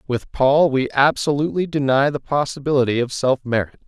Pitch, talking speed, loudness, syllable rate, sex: 135 Hz, 155 wpm, -19 LUFS, 5.5 syllables/s, male